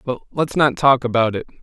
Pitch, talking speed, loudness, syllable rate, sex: 125 Hz, 220 wpm, -18 LUFS, 5.3 syllables/s, male